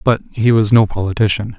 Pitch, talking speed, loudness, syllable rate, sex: 110 Hz, 190 wpm, -15 LUFS, 5.8 syllables/s, male